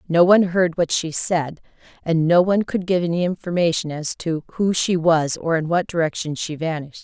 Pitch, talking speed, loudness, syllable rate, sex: 170 Hz, 205 wpm, -20 LUFS, 5.4 syllables/s, female